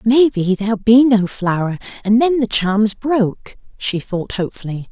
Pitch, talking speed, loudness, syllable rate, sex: 215 Hz, 160 wpm, -16 LUFS, 4.6 syllables/s, female